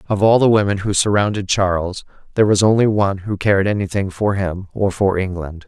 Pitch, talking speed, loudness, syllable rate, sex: 100 Hz, 200 wpm, -17 LUFS, 5.9 syllables/s, male